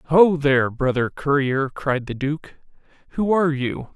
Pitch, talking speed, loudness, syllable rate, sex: 145 Hz, 150 wpm, -21 LUFS, 4.2 syllables/s, male